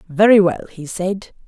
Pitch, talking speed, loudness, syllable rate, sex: 185 Hz, 160 wpm, -16 LUFS, 4.7 syllables/s, female